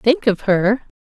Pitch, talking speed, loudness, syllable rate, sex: 225 Hz, 175 wpm, -17 LUFS, 3.5 syllables/s, female